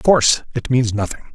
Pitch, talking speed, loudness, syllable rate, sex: 120 Hz, 225 wpm, -18 LUFS, 6.4 syllables/s, male